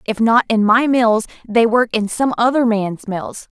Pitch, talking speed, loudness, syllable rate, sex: 230 Hz, 200 wpm, -16 LUFS, 4.2 syllables/s, female